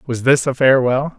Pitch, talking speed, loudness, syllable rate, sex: 130 Hz, 200 wpm, -15 LUFS, 5.2 syllables/s, male